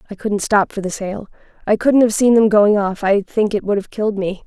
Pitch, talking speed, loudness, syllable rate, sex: 205 Hz, 270 wpm, -16 LUFS, 5.5 syllables/s, female